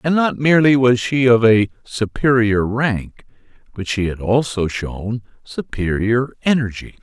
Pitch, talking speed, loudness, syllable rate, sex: 115 Hz, 135 wpm, -17 LUFS, 4.2 syllables/s, male